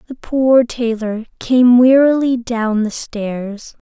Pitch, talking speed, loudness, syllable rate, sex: 235 Hz, 125 wpm, -15 LUFS, 3.2 syllables/s, female